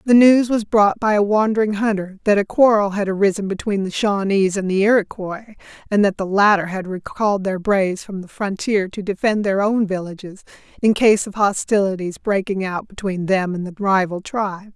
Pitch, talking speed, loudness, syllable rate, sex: 200 Hz, 190 wpm, -19 LUFS, 5.2 syllables/s, female